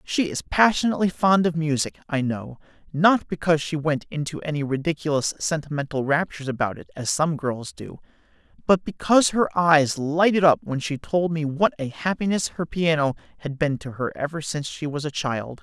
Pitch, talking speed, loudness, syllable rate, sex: 155 Hz, 185 wpm, -23 LUFS, 5.3 syllables/s, male